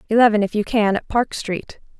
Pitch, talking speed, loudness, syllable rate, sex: 215 Hz, 210 wpm, -19 LUFS, 5.4 syllables/s, female